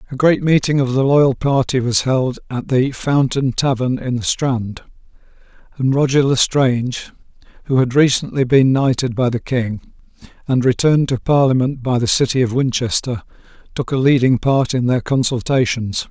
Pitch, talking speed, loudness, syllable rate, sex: 130 Hz, 160 wpm, -16 LUFS, 4.8 syllables/s, male